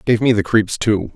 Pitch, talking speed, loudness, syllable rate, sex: 105 Hz, 260 wpm, -16 LUFS, 4.9 syllables/s, male